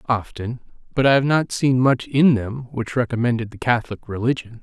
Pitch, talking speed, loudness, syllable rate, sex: 120 Hz, 180 wpm, -20 LUFS, 5.4 syllables/s, male